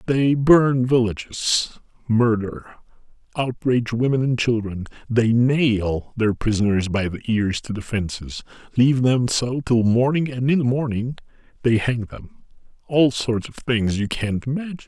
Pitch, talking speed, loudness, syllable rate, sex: 120 Hz, 145 wpm, -21 LUFS, 4.4 syllables/s, male